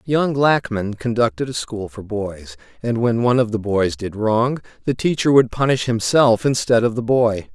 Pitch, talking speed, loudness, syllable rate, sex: 115 Hz, 190 wpm, -19 LUFS, 4.6 syllables/s, male